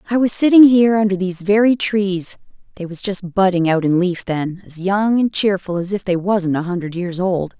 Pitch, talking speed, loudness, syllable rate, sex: 190 Hz, 215 wpm, -17 LUFS, 5.2 syllables/s, female